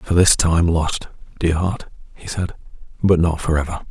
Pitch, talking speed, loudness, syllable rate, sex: 85 Hz, 170 wpm, -19 LUFS, 4.6 syllables/s, male